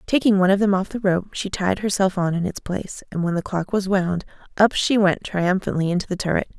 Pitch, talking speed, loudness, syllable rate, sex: 190 Hz, 245 wpm, -21 LUFS, 5.9 syllables/s, female